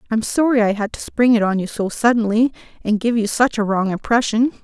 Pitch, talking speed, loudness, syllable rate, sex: 225 Hz, 235 wpm, -18 LUFS, 5.7 syllables/s, female